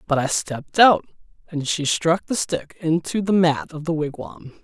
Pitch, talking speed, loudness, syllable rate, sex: 160 Hz, 195 wpm, -21 LUFS, 4.6 syllables/s, male